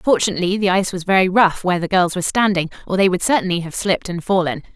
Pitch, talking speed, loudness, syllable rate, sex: 185 Hz, 240 wpm, -18 LUFS, 7.3 syllables/s, female